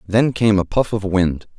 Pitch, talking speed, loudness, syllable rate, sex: 100 Hz, 230 wpm, -18 LUFS, 4.4 syllables/s, male